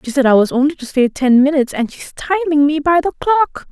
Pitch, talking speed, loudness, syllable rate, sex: 290 Hz, 260 wpm, -15 LUFS, 5.7 syllables/s, female